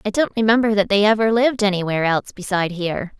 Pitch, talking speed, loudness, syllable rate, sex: 205 Hz, 205 wpm, -18 LUFS, 7.3 syllables/s, female